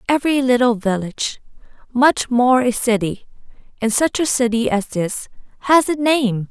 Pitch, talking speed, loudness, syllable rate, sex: 245 Hz, 150 wpm, -18 LUFS, 4.7 syllables/s, female